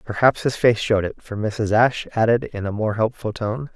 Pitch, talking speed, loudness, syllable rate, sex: 110 Hz, 225 wpm, -21 LUFS, 5.7 syllables/s, male